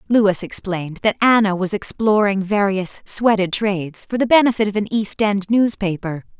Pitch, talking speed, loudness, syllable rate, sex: 205 Hz, 160 wpm, -18 LUFS, 4.8 syllables/s, female